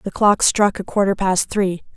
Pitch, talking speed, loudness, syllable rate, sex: 195 Hz, 215 wpm, -18 LUFS, 4.4 syllables/s, female